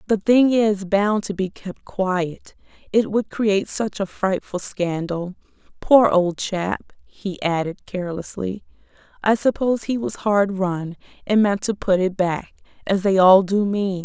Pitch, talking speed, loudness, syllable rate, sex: 195 Hz, 155 wpm, -20 LUFS, 4.0 syllables/s, female